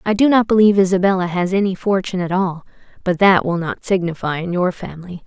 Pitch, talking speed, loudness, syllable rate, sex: 185 Hz, 205 wpm, -17 LUFS, 6.3 syllables/s, female